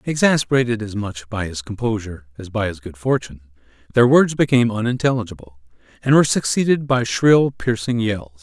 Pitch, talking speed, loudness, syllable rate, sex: 110 Hz, 155 wpm, -19 LUFS, 5.8 syllables/s, male